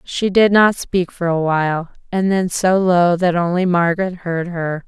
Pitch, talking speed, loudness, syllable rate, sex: 175 Hz, 195 wpm, -17 LUFS, 4.4 syllables/s, female